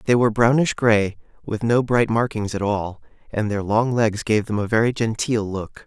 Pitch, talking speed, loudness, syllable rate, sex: 110 Hz, 205 wpm, -21 LUFS, 4.8 syllables/s, male